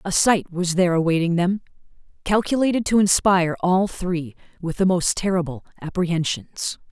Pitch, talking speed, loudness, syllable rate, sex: 180 Hz, 140 wpm, -21 LUFS, 5.1 syllables/s, female